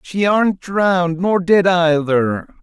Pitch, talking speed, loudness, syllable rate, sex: 175 Hz, 135 wpm, -16 LUFS, 3.2 syllables/s, male